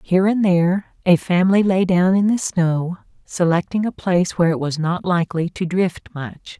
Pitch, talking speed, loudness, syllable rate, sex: 180 Hz, 190 wpm, -18 LUFS, 5.2 syllables/s, female